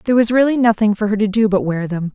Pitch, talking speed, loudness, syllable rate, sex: 210 Hz, 305 wpm, -16 LUFS, 7.0 syllables/s, female